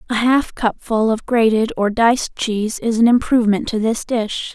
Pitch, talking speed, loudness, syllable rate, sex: 225 Hz, 185 wpm, -17 LUFS, 4.9 syllables/s, female